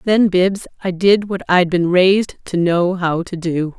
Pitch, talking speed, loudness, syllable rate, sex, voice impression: 180 Hz, 205 wpm, -16 LUFS, 4.1 syllables/s, female, feminine, adult-like, slightly clear, intellectual, slightly strict